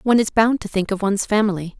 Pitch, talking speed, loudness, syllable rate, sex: 205 Hz, 270 wpm, -19 LUFS, 7.1 syllables/s, female